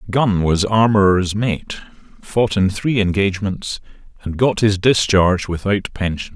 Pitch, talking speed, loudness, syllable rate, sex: 100 Hz, 130 wpm, -17 LUFS, 4.3 syllables/s, male